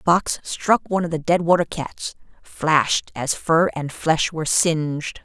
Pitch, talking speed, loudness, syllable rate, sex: 160 Hz, 185 wpm, -20 LUFS, 4.4 syllables/s, female